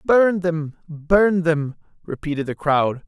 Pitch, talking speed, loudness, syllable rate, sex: 165 Hz, 135 wpm, -20 LUFS, 3.5 syllables/s, male